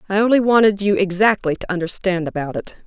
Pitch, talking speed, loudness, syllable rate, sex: 190 Hz, 190 wpm, -18 LUFS, 6.3 syllables/s, female